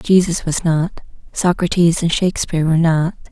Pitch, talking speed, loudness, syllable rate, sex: 165 Hz, 145 wpm, -17 LUFS, 5.0 syllables/s, female